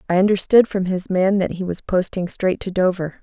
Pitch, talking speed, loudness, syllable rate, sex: 185 Hz, 225 wpm, -19 LUFS, 5.3 syllables/s, female